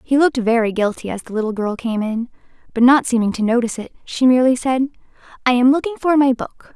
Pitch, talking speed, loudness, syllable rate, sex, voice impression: 245 Hz, 220 wpm, -17 LUFS, 6.3 syllables/s, female, feminine, slightly young, bright, soft, fluent, cute, calm, friendly, elegant, kind